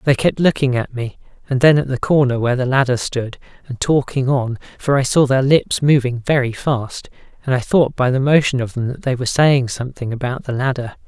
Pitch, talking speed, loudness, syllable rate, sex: 130 Hz, 220 wpm, -17 LUFS, 5.5 syllables/s, male